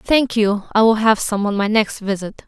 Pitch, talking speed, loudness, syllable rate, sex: 215 Hz, 240 wpm, -17 LUFS, 4.7 syllables/s, female